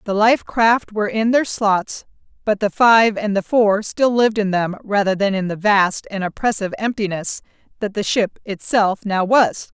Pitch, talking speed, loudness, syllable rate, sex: 210 Hz, 185 wpm, -18 LUFS, 4.7 syllables/s, female